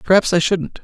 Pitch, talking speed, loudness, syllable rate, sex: 180 Hz, 215 wpm, -16 LUFS, 5.5 syllables/s, male